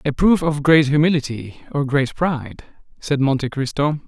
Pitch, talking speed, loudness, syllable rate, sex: 145 Hz, 160 wpm, -19 LUFS, 4.9 syllables/s, male